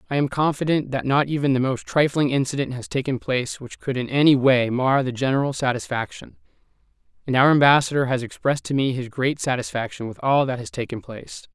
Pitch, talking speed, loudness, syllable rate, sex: 130 Hz, 200 wpm, -22 LUFS, 6.0 syllables/s, male